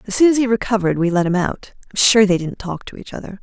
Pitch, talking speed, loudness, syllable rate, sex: 200 Hz, 300 wpm, -17 LUFS, 7.4 syllables/s, female